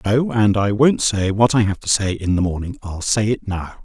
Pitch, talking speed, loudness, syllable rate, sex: 105 Hz, 265 wpm, -18 LUFS, 5.0 syllables/s, male